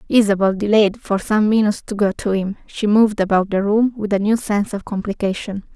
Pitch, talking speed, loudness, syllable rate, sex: 205 Hz, 210 wpm, -18 LUFS, 5.7 syllables/s, female